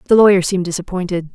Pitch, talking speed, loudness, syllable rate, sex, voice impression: 185 Hz, 180 wpm, -16 LUFS, 8.0 syllables/s, female, feminine, slightly gender-neutral, slightly young, slightly adult-like, slightly thin, slightly tensed, slightly powerful, slightly dark, hard, slightly clear, fluent, cute, intellectual, slightly refreshing, sincere, slightly calm, very friendly, reassuring, very elegant, sweet, slightly lively, very kind, slightly modest